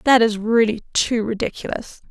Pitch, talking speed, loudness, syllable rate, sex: 225 Hz, 145 wpm, -20 LUFS, 5.0 syllables/s, female